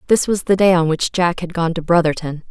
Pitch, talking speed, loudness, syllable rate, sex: 175 Hz, 265 wpm, -17 LUFS, 5.7 syllables/s, female